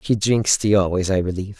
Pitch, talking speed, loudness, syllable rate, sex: 100 Hz, 225 wpm, -19 LUFS, 5.8 syllables/s, male